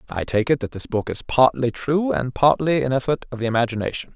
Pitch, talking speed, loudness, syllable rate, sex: 125 Hz, 230 wpm, -21 LUFS, 5.9 syllables/s, male